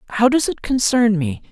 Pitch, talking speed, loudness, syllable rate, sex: 210 Hz, 200 wpm, -17 LUFS, 5.6 syllables/s, male